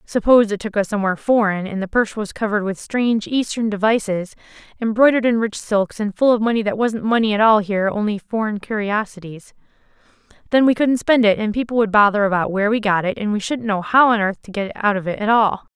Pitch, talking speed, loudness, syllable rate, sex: 215 Hz, 230 wpm, -18 LUFS, 6.2 syllables/s, female